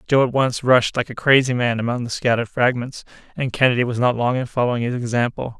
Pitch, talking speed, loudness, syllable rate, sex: 125 Hz, 225 wpm, -19 LUFS, 6.2 syllables/s, male